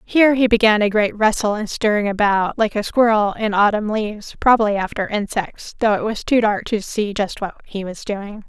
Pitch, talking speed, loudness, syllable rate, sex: 210 Hz, 210 wpm, -18 LUFS, 5.1 syllables/s, female